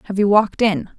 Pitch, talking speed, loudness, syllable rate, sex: 200 Hz, 245 wpm, -17 LUFS, 6.4 syllables/s, female